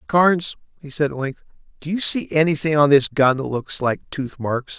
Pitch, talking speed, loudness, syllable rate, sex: 150 Hz, 215 wpm, -19 LUFS, 5.0 syllables/s, male